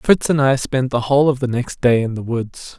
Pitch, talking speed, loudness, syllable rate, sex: 130 Hz, 280 wpm, -18 LUFS, 5.1 syllables/s, male